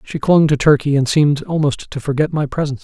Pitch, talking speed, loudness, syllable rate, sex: 145 Hz, 235 wpm, -16 LUFS, 6.2 syllables/s, male